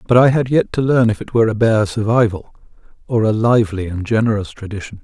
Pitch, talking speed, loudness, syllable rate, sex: 110 Hz, 215 wpm, -16 LUFS, 6.2 syllables/s, male